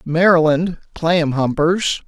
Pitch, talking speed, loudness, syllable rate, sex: 165 Hz, 85 wpm, -16 LUFS, 3.4 syllables/s, male